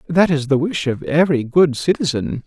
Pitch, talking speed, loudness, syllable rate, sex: 150 Hz, 195 wpm, -17 LUFS, 5.2 syllables/s, male